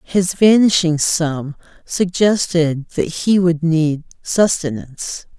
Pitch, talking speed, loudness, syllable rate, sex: 170 Hz, 100 wpm, -16 LUFS, 3.4 syllables/s, female